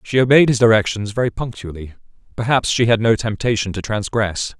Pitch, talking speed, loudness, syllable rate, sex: 110 Hz, 170 wpm, -17 LUFS, 5.7 syllables/s, male